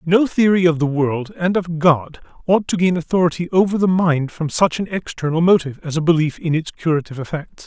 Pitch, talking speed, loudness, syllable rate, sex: 165 Hz, 210 wpm, -18 LUFS, 5.7 syllables/s, male